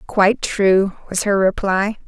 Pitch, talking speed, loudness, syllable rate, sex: 200 Hz, 145 wpm, -17 LUFS, 4.0 syllables/s, female